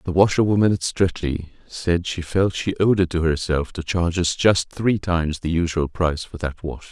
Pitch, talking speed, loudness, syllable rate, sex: 85 Hz, 210 wpm, -21 LUFS, 5.0 syllables/s, male